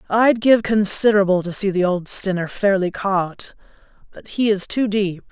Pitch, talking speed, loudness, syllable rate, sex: 200 Hz, 170 wpm, -18 LUFS, 4.6 syllables/s, female